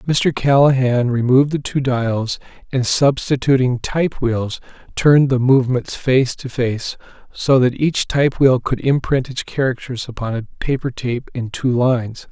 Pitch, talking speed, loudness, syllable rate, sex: 130 Hz, 155 wpm, -17 LUFS, 4.5 syllables/s, male